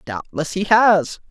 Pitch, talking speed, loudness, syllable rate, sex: 180 Hz, 140 wpm, -17 LUFS, 3.5 syllables/s, male